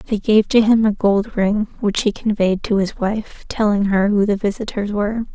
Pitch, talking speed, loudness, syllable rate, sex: 210 Hz, 215 wpm, -18 LUFS, 4.9 syllables/s, female